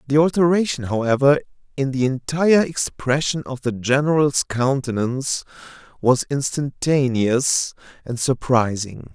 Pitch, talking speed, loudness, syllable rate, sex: 135 Hz, 100 wpm, -20 LUFS, 4.4 syllables/s, male